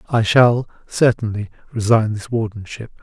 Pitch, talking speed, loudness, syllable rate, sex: 110 Hz, 120 wpm, -18 LUFS, 4.7 syllables/s, male